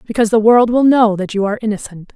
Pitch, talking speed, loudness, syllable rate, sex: 220 Hz, 250 wpm, -13 LUFS, 7.0 syllables/s, female